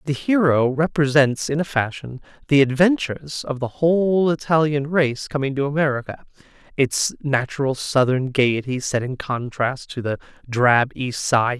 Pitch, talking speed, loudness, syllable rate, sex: 140 Hz, 145 wpm, -20 LUFS, 4.6 syllables/s, male